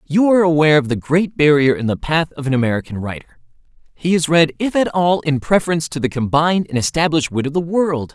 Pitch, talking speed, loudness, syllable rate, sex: 155 Hz, 230 wpm, -17 LUFS, 6.3 syllables/s, male